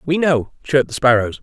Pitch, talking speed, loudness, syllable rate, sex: 135 Hz, 210 wpm, -17 LUFS, 5.7 syllables/s, male